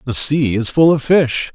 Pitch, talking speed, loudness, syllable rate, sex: 140 Hz, 235 wpm, -14 LUFS, 4.3 syllables/s, male